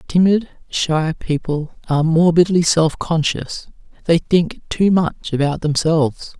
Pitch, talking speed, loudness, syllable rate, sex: 165 Hz, 120 wpm, -17 LUFS, 4.0 syllables/s, male